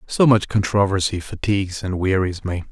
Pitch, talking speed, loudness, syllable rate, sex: 100 Hz, 155 wpm, -20 LUFS, 5.1 syllables/s, male